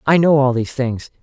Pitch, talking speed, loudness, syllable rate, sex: 135 Hz, 245 wpm, -16 LUFS, 5.9 syllables/s, male